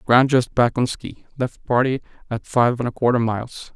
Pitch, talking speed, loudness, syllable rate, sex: 120 Hz, 210 wpm, -20 LUFS, 4.9 syllables/s, male